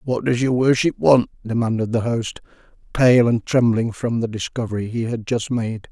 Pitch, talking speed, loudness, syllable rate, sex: 115 Hz, 185 wpm, -19 LUFS, 4.8 syllables/s, male